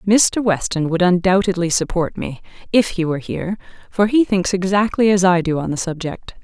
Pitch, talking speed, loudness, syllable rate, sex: 185 Hz, 185 wpm, -18 LUFS, 5.3 syllables/s, female